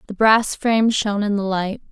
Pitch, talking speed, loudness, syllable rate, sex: 210 Hz, 220 wpm, -18 LUFS, 5.4 syllables/s, female